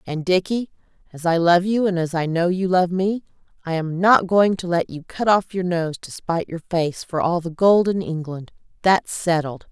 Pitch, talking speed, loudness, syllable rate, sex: 175 Hz, 220 wpm, -20 LUFS, 4.8 syllables/s, female